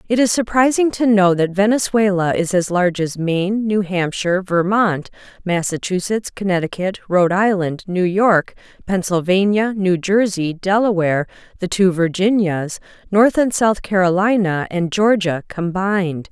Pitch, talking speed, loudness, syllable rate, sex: 190 Hz, 130 wpm, -17 LUFS, 4.6 syllables/s, female